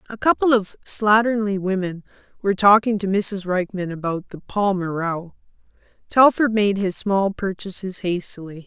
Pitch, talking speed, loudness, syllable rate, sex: 195 Hz, 140 wpm, -20 LUFS, 4.8 syllables/s, female